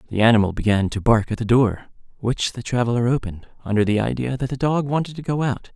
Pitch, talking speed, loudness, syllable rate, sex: 120 Hz, 230 wpm, -21 LUFS, 6.3 syllables/s, male